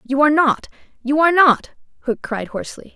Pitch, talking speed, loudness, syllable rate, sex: 275 Hz, 185 wpm, -17 LUFS, 6.2 syllables/s, female